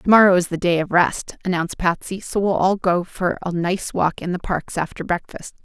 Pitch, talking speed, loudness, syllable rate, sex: 180 Hz, 225 wpm, -20 LUFS, 5.2 syllables/s, female